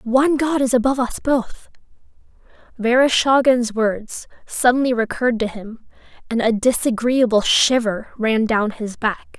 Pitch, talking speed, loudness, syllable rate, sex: 240 Hz, 120 wpm, -18 LUFS, 4.6 syllables/s, female